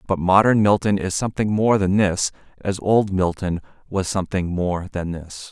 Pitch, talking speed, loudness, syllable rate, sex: 95 Hz, 175 wpm, -20 LUFS, 4.9 syllables/s, male